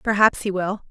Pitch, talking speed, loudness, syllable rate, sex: 200 Hz, 200 wpm, -20 LUFS, 5.5 syllables/s, female